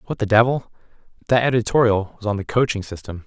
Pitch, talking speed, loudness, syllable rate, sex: 110 Hz, 165 wpm, -20 LUFS, 6.1 syllables/s, male